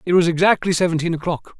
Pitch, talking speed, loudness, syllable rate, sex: 170 Hz, 190 wpm, -18 LUFS, 6.9 syllables/s, male